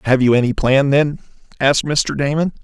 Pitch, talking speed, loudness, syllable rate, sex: 140 Hz, 185 wpm, -16 LUFS, 5.4 syllables/s, male